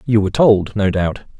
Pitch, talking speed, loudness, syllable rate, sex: 105 Hz, 215 wpm, -16 LUFS, 5.0 syllables/s, male